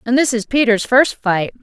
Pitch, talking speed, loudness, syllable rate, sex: 235 Hz, 220 wpm, -15 LUFS, 4.9 syllables/s, female